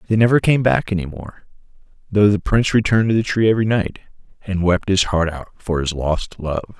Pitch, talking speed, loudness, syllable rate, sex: 100 Hz, 210 wpm, -18 LUFS, 5.7 syllables/s, male